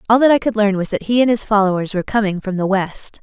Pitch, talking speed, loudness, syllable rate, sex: 210 Hz, 295 wpm, -17 LUFS, 6.6 syllables/s, female